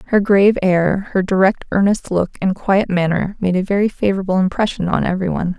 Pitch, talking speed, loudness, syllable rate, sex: 190 Hz, 195 wpm, -17 LUFS, 6.0 syllables/s, female